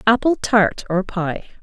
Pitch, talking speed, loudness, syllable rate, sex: 205 Hz, 185 wpm, -19 LUFS, 4.6 syllables/s, female